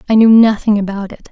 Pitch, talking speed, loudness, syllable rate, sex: 210 Hz, 230 wpm, -11 LUFS, 6.2 syllables/s, female